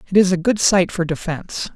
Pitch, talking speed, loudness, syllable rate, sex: 180 Hz, 240 wpm, -18 LUFS, 5.9 syllables/s, male